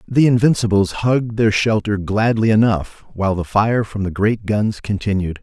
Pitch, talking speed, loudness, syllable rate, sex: 105 Hz, 165 wpm, -17 LUFS, 4.8 syllables/s, male